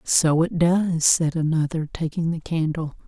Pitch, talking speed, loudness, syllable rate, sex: 160 Hz, 155 wpm, -22 LUFS, 4.1 syllables/s, female